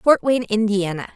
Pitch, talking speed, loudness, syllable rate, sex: 215 Hz, 155 wpm, -20 LUFS, 5.4 syllables/s, female